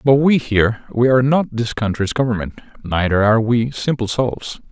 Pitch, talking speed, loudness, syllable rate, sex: 115 Hz, 165 wpm, -17 LUFS, 5.2 syllables/s, male